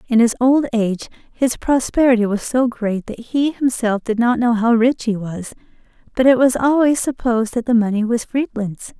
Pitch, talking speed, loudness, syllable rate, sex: 240 Hz, 195 wpm, -17 LUFS, 5.0 syllables/s, female